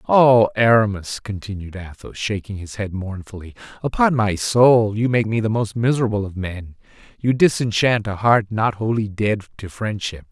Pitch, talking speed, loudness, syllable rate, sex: 105 Hz, 165 wpm, -19 LUFS, 4.8 syllables/s, male